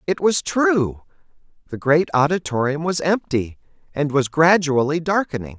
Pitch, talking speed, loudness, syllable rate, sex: 155 Hz, 120 wpm, -19 LUFS, 4.5 syllables/s, male